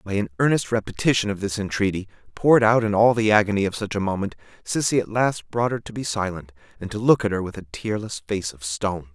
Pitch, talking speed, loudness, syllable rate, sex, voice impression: 105 Hz, 235 wpm, -22 LUFS, 6.2 syllables/s, male, masculine, adult-like, tensed, powerful, slightly bright, clear, fluent, cool, friendly, wild, lively, slightly intense